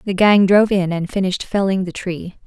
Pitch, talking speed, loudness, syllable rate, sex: 190 Hz, 220 wpm, -17 LUFS, 5.7 syllables/s, female